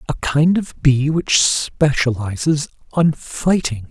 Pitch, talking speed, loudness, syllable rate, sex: 145 Hz, 125 wpm, -17 LUFS, 3.5 syllables/s, male